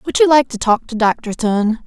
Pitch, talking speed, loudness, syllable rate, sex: 240 Hz, 260 wpm, -15 LUFS, 4.6 syllables/s, female